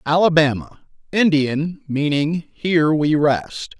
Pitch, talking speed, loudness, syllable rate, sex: 155 Hz, 80 wpm, -18 LUFS, 3.6 syllables/s, male